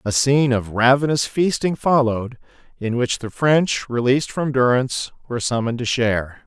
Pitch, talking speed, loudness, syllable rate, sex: 125 Hz, 160 wpm, -19 LUFS, 5.3 syllables/s, male